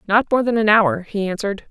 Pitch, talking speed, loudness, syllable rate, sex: 210 Hz, 245 wpm, -18 LUFS, 6.0 syllables/s, female